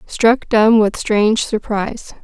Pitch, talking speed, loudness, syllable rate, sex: 220 Hz, 135 wpm, -15 LUFS, 3.9 syllables/s, female